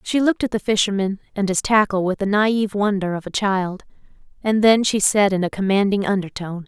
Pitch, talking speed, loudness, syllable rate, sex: 200 Hz, 205 wpm, -19 LUFS, 5.8 syllables/s, female